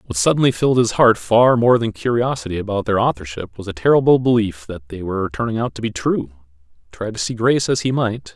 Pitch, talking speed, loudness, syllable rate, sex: 110 Hz, 225 wpm, -18 LUFS, 6.0 syllables/s, male